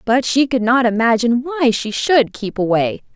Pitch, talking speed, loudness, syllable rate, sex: 235 Hz, 190 wpm, -16 LUFS, 5.0 syllables/s, female